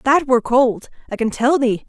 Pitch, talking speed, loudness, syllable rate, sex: 250 Hz, 225 wpm, -17 LUFS, 4.9 syllables/s, female